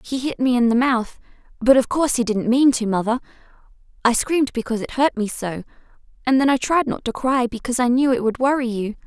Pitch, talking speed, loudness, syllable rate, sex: 245 Hz, 230 wpm, -20 LUFS, 6.1 syllables/s, female